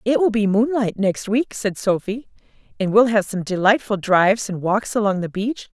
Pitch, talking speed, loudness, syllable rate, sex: 210 Hz, 195 wpm, -19 LUFS, 4.9 syllables/s, female